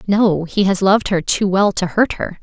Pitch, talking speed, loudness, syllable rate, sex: 195 Hz, 245 wpm, -16 LUFS, 4.8 syllables/s, female